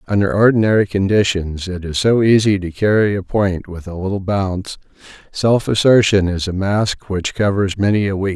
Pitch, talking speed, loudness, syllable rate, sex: 100 Hz, 180 wpm, -16 LUFS, 5.2 syllables/s, male